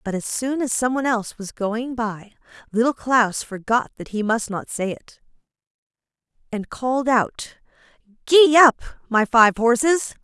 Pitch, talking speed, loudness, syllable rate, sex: 235 Hz, 150 wpm, -20 LUFS, 4.4 syllables/s, female